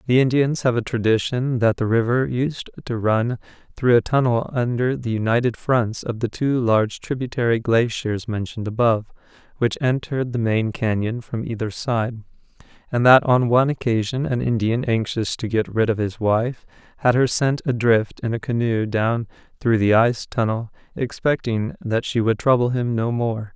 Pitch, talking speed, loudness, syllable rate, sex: 120 Hz, 175 wpm, -21 LUFS, 4.9 syllables/s, male